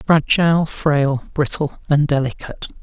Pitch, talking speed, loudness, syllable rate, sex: 150 Hz, 105 wpm, -18 LUFS, 4.4 syllables/s, male